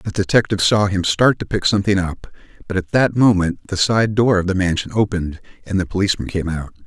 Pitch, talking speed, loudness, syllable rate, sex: 95 Hz, 220 wpm, -18 LUFS, 6.1 syllables/s, male